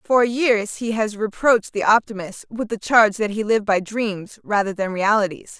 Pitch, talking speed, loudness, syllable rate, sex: 215 Hz, 195 wpm, -20 LUFS, 5.0 syllables/s, female